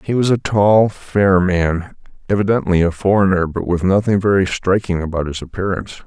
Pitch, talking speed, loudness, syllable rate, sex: 95 Hz, 170 wpm, -16 LUFS, 5.1 syllables/s, male